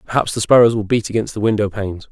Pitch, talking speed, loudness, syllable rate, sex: 110 Hz, 225 wpm, -17 LUFS, 7.1 syllables/s, male